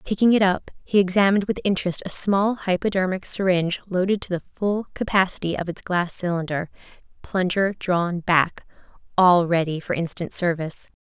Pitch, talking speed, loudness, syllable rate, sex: 185 Hz, 145 wpm, -22 LUFS, 5.3 syllables/s, female